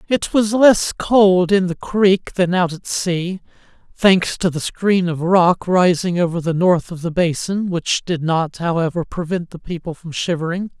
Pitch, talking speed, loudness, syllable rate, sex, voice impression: 180 Hz, 185 wpm, -17 LUFS, 4.2 syllables/s, male, very masculine, slightly feminine, gender-neutral, adult-like, middle-aged, slightly thick, tensed, slightly powerful, slightly bright, soft, clear, fluent, slightly cool, intellectual, refreshing, very sincere, very calm, slightly mature, slightly friendly, reassuring, very unique, slightly elegant, wild, slightly sweet, lively, kind, slightly intense, slightly modest